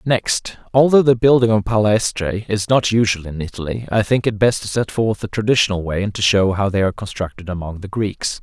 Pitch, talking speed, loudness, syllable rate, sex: 105 Hz, 220 wpm, -18 LUFS, 5.5 syllables/s, male